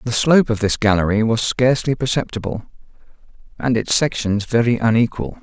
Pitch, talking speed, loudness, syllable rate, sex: 115 Hz, 145 wpm, -18 LUFS, 5.7 syllables/s, male